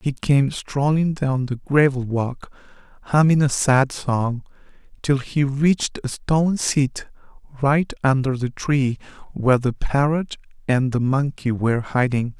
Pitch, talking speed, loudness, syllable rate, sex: 135 Hz, 140 wpm, -20 LUFS, 4.1 syllables/s, male